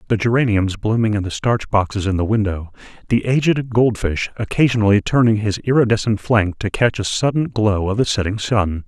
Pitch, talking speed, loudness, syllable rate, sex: 110 Hz, 185 wpm, -18 LUFS, 5.4 syllables/s, male